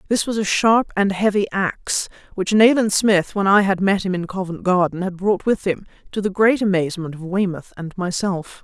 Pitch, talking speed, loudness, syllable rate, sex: 195 Hz, 210 wpm, -19 LUFS, 5.1 syllables/s, female